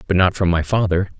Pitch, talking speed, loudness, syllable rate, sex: 90 Hz, 250 wpm, -18 LUFS, 6.2 syllables/s, male